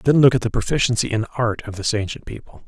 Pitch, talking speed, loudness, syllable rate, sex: 110 Hz, 245 wpm, -20 LUFS, 6.4 syllables/s, male